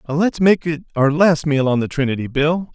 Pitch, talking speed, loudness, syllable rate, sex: 150 Hz, 220 wpm, -17 LUFS, 4.8 syllables/s, male